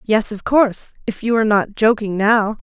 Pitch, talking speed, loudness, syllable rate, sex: 215 Hz, 205 wpm, -17 LUFS, 5.2 syllables/s, female